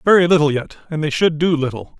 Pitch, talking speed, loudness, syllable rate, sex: 155 Hz, 240 wpm, -17 LUFS, 6.4 syllables/s, male